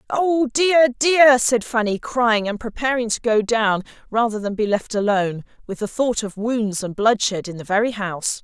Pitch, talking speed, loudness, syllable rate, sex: 225 Hz, 190 wpm, -19 LUFS, 4.7 syllables/s, female